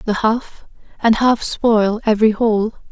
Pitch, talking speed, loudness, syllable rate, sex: 220 Hz, 145 wpm, -16 LUFS, 4.5 syllables/s, female